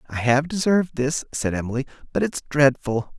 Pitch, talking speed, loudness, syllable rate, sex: 140 Hz, 170 wpm, -22 LUFS, 5.4 syllables/s, male